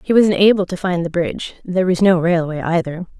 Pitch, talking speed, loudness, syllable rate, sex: 180 Hz, 225 wpm, -17 LUFS, 6.2 syllables/s, female